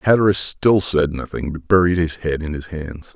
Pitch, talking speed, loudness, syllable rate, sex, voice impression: 85 Hz, 210 wpm, -19 LUFS, 5.0 syllables/s, male, very masculine, very adult-like, slightly old, very thick, slightly tensed, powerful, slightly bright, hard, very clear, fluent, raspy, very cool, very intellectual, sincere, very calm, very mature, friendly, reassuring, very unique, very wild, slightly lively, kind, slightly modest